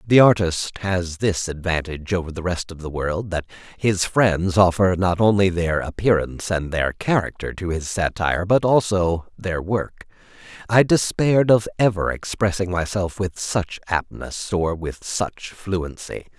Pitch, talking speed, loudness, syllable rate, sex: 90 Hz, 155 wpm, -21 LUFS, 4.4 syllables/s, male